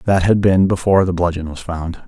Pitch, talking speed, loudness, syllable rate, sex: 90 Hz, 230 wpm, -16 LUFS, 5.7 syllables/s, male